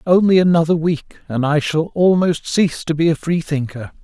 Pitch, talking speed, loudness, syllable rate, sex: 160 Hz, 195 wpm, -17 LUFS, 5.1 syllables/s, male